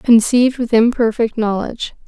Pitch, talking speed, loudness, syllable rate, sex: 230 Hz, 115 wpm, -15 LUFS, 5.3 syllables/s, female